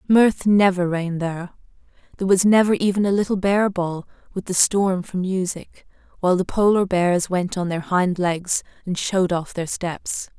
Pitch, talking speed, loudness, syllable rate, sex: 185 Hz, 180 wpm, -20 LUFS, 4.8 syllables/s, female